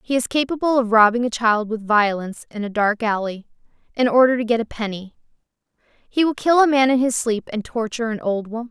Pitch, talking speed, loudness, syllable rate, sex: 235 Hz, 220 wpm, -19 LUFS, 5.9 syllables/s, female